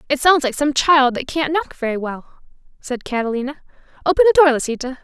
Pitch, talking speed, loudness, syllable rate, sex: 280 Hz, 190 wpm, -17 LUFS, 6.3 syllables/s, female